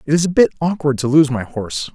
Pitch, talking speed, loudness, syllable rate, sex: 140 Hz, 275 wpm, -17 LUFS, 6.5 syllables/s, male